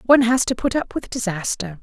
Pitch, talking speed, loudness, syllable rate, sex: 225 Hz, 230 wpm, -20 LUFS, 6.0 syllables/s, female